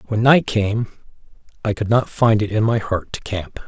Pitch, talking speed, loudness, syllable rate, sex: 110 Hz, 215 wpm, -19 LUFS, 4.8 syllables/s, male